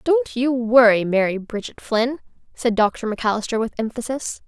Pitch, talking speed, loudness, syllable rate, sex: 235 Hz, 150 wpm, -20 LUFS, 5.1 syllables/s, female